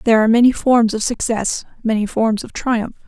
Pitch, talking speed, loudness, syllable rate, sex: 225 Hz, 195 wpm, -17 LUFS, 5.4 syllables/s, female